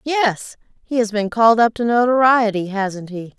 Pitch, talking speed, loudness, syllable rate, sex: 225 Hz, 175 wpm, -17 LUFS, 4.7 syllables/s, female